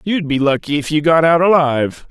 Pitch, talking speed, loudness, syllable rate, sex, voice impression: 155 Hz, 230 wpm, -14 LUFS, 5.5 syllables/s, male, very masculine, very middle-aged, very thick, tensed, very powerful, bright, soft, muffled, fluent, raspy, very cool, intellectual, refreshing, sincere, very calm, very mature, very friendly, reassuring, very unique, elegant, wild, sweet, lively, very kind, slightly intense